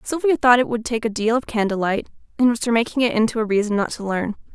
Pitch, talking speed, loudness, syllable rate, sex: 230 Hz, 265 wpm, -20 LUFS, 6.5 syllables/s, female